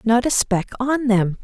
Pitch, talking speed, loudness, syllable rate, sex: 230 Hz, 210 wpm, -19 LUFS, 4.1 syllables/s, female